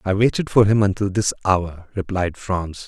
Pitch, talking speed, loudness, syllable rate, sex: 95 Hz, 190 wpm, -20 LUFS, 4.6 syllables/s, male